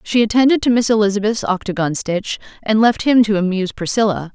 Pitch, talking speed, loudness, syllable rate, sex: 210 Hz, 180 wpm, -16 LUFS, 6.0 syllables/s, female